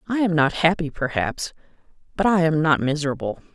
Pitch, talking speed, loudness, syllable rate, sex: 160 Hz, 170 wpm, -21 LUFS, 5.6 syllables/s, female